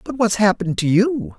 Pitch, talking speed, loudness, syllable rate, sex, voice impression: 200 Hz, 215 wpm, -18 LUFS, 5.4 syllables/s, male, masculine, adult-like, slightly refreshing, sincere, friendly, slightly kind